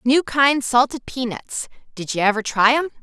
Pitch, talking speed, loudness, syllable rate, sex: 250 Hz, 180 wpm, -19 LUFS, 4.7 syllables/s, female